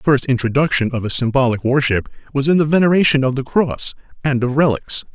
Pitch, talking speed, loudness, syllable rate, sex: 135 Hz, 200 wpm, -17 LUFS, 6.1 syllables/s, male